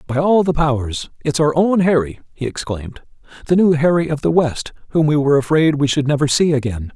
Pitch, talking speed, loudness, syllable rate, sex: 145 Hz, 215 wpm, -17 LUFS, 5.8 syllables/s, male